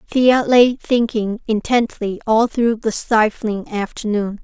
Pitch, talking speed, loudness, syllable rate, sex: 225 Hz, 120 wpm, -17 LUFS, 3.6 syllables/s, female